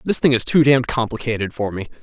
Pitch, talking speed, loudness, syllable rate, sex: 120 Hz, 235 wpm, -18 LUFS, 6.6 syllables/s, male